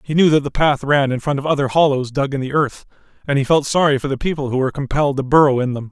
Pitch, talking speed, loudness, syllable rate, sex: 140 Hz, 295 wpm, -17 LUFS, 6.9 syllables/s, male